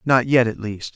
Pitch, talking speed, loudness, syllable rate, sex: 120 Hz, 250 wpm, -19 LUFS, 4.7 syllables/s, male